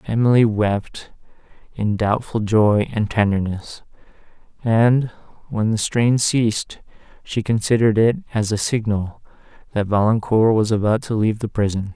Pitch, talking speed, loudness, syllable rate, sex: 110 Hz, 130 wpm, -19 LUFS, 4.6 syllables/s, male